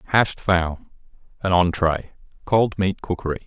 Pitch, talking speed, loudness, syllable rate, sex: 90 Hz, 105 wpm, -21 LUFS, 3.7 syllables/s, male